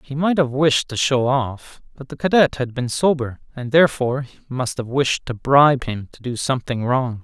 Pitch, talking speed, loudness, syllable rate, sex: 130 Hz, 205 wpm, -19 LUFS, 5.0 syllables/s, male